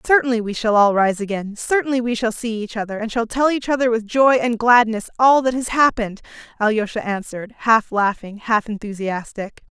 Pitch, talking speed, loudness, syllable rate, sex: 225 Hz, 190 wpm, -19 LUFS, 5.4 syllables/s, female